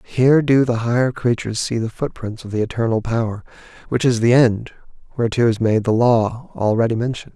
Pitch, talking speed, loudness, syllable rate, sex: 115 Hz, 190 wpm, -18 LUFS, 5.9 syllables/s, male